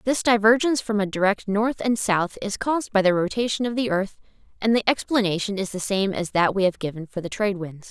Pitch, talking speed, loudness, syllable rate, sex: 205 Hz, 235 wpm, -23 LUFS, 5.9 syllables/s, female